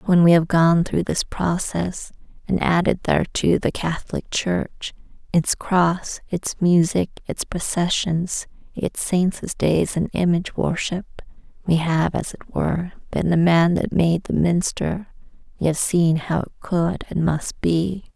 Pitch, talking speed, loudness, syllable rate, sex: 170 Hz, 150 wpm, -21 LUFS, 3.9 syllables/s, female